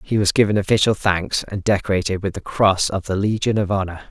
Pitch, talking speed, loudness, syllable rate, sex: 100 Hz, 220 wpm, -19 LUFS, 5.8 syllables/s, male